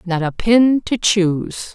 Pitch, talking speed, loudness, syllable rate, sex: 200 Hz, 170 wpm, -16 LUFS, 3.7 syllables/s, female